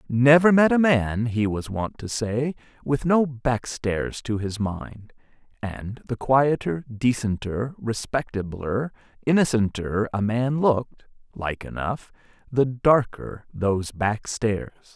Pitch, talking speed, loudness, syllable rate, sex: 120 Hz, 110 wpm, -23 LUFS, 3.7 syllables/s, male